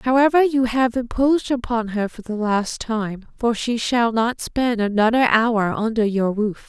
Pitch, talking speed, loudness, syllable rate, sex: 230 Hz, 180 wpm, -20 LUFS, 4.3 syllables/s, female